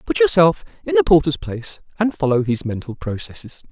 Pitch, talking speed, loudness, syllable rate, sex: 160 Hz, 180 wpm, -19 LUFS, 5.7 syllables/s, male